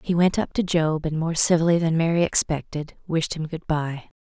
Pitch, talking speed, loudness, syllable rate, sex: 165 Hz, 215 wpm, -22 LUFS, 5.1 syllables/s, female